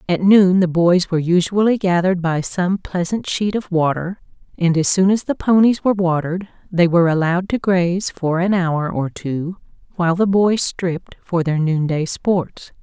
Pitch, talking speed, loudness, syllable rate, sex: 180 Hz, 180 wpm, -17 LUFS, 4.9 syllables/s, female